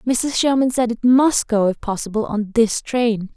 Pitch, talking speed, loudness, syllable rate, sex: 230 Hz, 195 wpm, -18 LUFS, 4.3 syllables/s, female